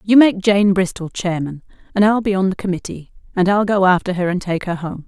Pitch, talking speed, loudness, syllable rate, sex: 190 Hz, 235 wpm, -17 LUFS, 5.7 syllables/s, female